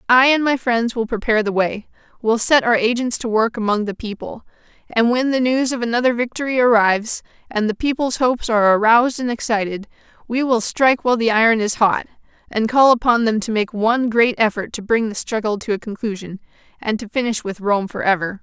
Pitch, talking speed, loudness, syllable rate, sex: 230 Hz, 205 wpm, -18 LUFS, 5.8 syllables/s, female